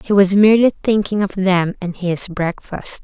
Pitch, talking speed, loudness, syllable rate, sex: 195 Hz, 180 wpm, -16 LUFS, 4.7 syllables/s, female